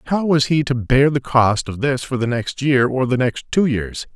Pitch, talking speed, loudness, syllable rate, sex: 130 Hz, 275 wpm, -18 LUFS, 4.8 syllables/s, male